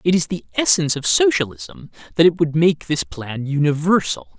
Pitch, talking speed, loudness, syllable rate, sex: 160 Hz, 180 wpm, -18 LUFS, 5.1 syllables/s, male